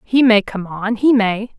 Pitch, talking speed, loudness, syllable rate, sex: 220 Hz, 190 wpm, -15 LUFS, 4.1 syllables/s, female